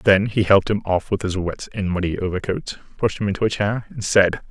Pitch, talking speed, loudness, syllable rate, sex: 100 Hz, 240 wpm, -21 LUFS, 5.7 syllables/s, male